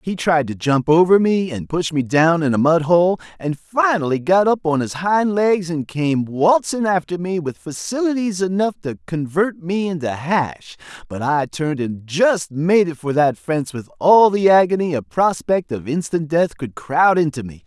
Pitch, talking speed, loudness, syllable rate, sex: 165 Hz, 195 wpm, -18 LUFS, 4.5 syllables/s, male